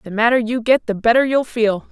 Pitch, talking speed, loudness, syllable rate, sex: 230 Hz, 250 wpm, -17 LUFS, 5.6 syllables/s, female